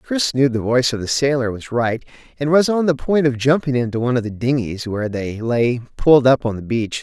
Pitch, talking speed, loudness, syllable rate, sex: 125 Hz, 250 wpm, -18 LUFS, 5.8 syllables/s, male